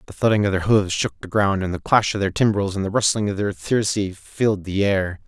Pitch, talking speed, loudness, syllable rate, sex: 100 Hz, 260 wpm, -21 LUFS, 5.8 syllables/s, male